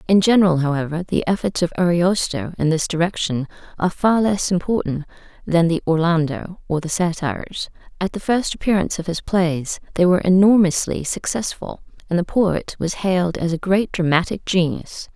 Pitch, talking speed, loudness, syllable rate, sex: 175 Hz, 160 wpm, -19 LUFS, 5.3 syllables/s, female